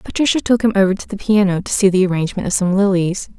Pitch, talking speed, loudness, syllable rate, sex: 195 Hz, 250 wpm, -16 LUFS, 6.9 syllables/s, female